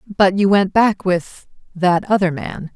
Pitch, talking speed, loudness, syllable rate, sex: 190 Hz, 155 wpm, -17 LUFS, 3.9 syllables/s, female